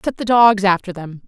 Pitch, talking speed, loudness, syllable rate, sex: 205 Hz, 235 wpm, -15 LUFS, 5.2 syllables/s, female